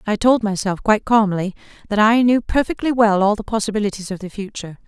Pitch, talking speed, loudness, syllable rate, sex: 210 Hz, 195 wpm, -18 LUFS, 6.2 syllables/s, female